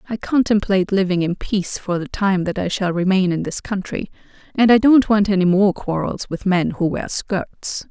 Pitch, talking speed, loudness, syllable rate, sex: 190 Hz, 205 wpm, -19 LUFS, 5.0 syllables/s, female